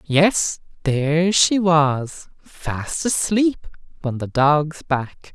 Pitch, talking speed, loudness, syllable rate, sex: 160 Hz, 110 wpm, -19 LUFS, 2.6 syllables/s, male